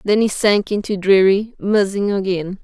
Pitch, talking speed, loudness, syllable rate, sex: 200 Hz, 160 wpm, -17 LUFS, 4.4 syllables/s, female